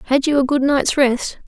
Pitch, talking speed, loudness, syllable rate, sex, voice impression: 270 Hz, 245 wpm, -17 LUFS, 5.0 syllables/s, female, very feminine, young, slightly adult-like, very thin, slightly tensed, slightly weak, slightly bright, soft, clear, slightly fluent, very cute, intellectual, refreshing, very sincere, slightly calm, very friendly, very reassuring, very unique, elegant, very sweet, kind, intense, slightly sharp